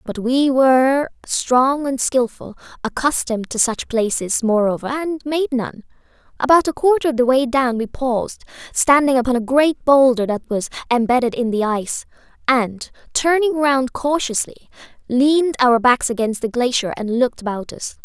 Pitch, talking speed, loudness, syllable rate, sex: 255 Hz, 160 wpm, -18 LUFS, 4.8 syllables/s, female